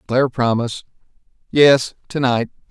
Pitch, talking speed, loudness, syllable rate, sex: 125 Hz, 90 wpm, -17 LUFS, 5.1 syllables/s, male